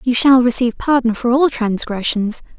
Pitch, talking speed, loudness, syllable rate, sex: 245 Hz, 160 wpm, -15 LUFS, 5.1 syllables/s, female